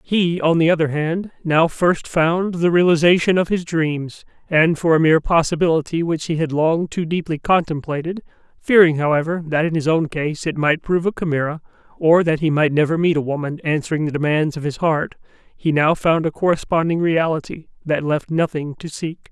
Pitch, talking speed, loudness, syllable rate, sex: 160 Hz, 195 wpm, -18 LUFS, 5.3 syllables/s, male